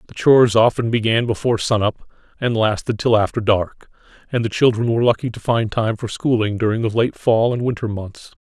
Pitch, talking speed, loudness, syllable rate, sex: 115 Hz, 205 wpm, -18 LUFS, 5.6 syllables/s, male